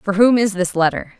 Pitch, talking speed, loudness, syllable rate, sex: 195 Hz, 250 wpm, -16 LUFS, 5.4 syllables/s, female